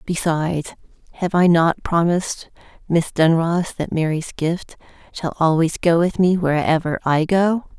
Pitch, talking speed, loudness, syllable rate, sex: 170 Hz, 140 wpm, -19 LUFS, 4.4 syllables/s, female